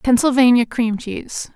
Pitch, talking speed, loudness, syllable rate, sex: 240 Hz, 115 wpm, -17 LUFS, 4.7 syllables/s, female